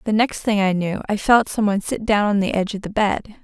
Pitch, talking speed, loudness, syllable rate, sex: 205 Hz, 295 wpm, -20 LUFS, 5.9 syllables/s, female